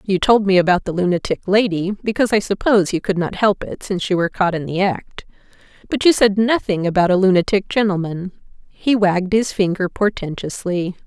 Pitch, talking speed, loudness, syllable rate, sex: 190 Hz, 180 wpm, -18 LUFS, 5.7 syllables/s, female